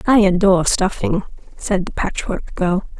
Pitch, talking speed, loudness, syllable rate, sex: 190 Hz, 140 wpm, -18 LUFS, 4.5 syllables/s, female